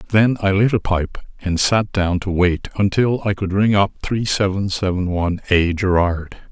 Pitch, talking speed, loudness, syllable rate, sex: 95 Hz, 195 wpm, -18 LUFS, 4.6 syllables/s, male